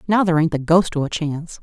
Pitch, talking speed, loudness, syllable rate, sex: 165 Hz, 295 wpm, -19 LUFS, 6.2 syllables/s, female